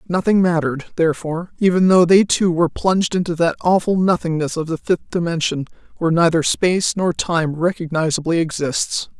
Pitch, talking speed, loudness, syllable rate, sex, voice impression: 170 Hz, 155 wpm, -18 LUFS, 5.5 syllables/s, female, feminine, slightly gender-neutral, adult-like, relaxed, soft, muffled, raspy, intellectual, friendly, reassuring, lively